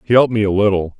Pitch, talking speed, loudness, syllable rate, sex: 105 Hz, 300 wpm, -15 LUFS, 7.9 syllables/s, male